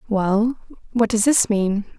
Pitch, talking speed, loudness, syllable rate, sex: 220 Hz, 150 wpm, -19 LUFS, 3.7 syllables/s, female